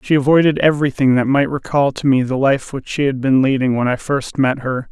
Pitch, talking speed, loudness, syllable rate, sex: 135 Hz, 245 wpm, -16 LUFS, 5.6 syllables/s, male